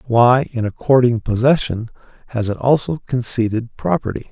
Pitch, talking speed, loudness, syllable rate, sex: 120 Hz, 125 wpm, -17 LUFS, 5.0 syllables/s, male